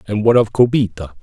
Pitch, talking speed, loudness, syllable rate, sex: 110 Hz, 195 wpm, -15 LUFS, 6.5 syllables/s, male